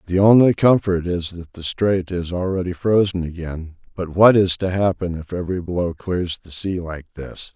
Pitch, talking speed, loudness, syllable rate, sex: 90 Hz, 190 wpm, -19 LUFS, 4.8 syllables/s, male